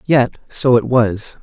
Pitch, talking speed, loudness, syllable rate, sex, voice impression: 120 Hz, 170 wpm, -16 LUFS, 3.5 syllables/s, male, masculine, adult-like, tensed, powerful, bright, slightly soft, slightly raspy, intellectual, calm, friendly, reassuring, slightly wild, slightly kind